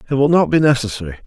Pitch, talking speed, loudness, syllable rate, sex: 125 Hz, 235 wpm, -15 LUFS, 8.2 syllables/s, male